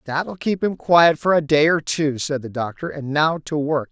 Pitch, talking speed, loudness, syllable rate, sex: 150 Hz, 260 wpm, -20 LUFS, 4.8 syllables/s, male